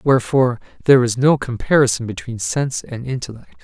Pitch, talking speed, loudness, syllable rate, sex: 125 Hz, 150 wpm, -18 LUFS, 6.2 syllables/s, male